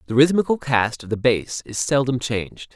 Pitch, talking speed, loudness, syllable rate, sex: 125 Hz, 195 wpm, -21 LUFS, 5.1 syllables/s, male